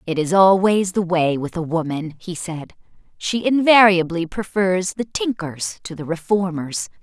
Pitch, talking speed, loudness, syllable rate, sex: 180 Hz, 155 wpm, -19 LUFS, 4.3 syllables/s, female